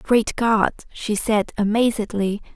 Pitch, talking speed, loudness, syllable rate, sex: 215 Hz, 115 wpm, -21 LUFS, 4.0 syllables/s, female